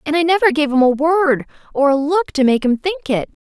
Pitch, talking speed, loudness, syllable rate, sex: 285 Hz, 260 wpm, -16 LUFS, 5.4 syllables/s, female